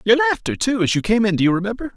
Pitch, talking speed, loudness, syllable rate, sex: 195 Hz, 305 wpm, -18 LUFS, 7.2 syllables/s, male